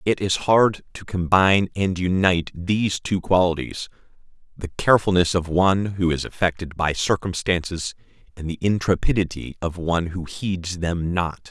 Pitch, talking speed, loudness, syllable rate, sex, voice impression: 90 Hz, 145 wpm, -22 LUFS, 4.9 syllables/s, male, very masculine, very adult-like, very middle-aged, very thick, tensed, very powerful, bright, soft, clear, very fluent, slightly raspy, very cool, intellectual, refreshing, sincere, very calm, very mature, very friendly, very reassuring, very unique, elegant, wild, sweet, lively, kind